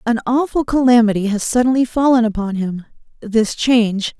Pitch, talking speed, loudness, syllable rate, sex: 230 Hz, 130 wpm, -16 LUFS, 5.2 syllables/s, female